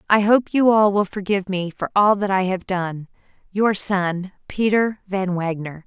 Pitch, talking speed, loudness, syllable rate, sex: 195 Hz, 185 wpm, -20 LUFS, 4.6 syllables/s, female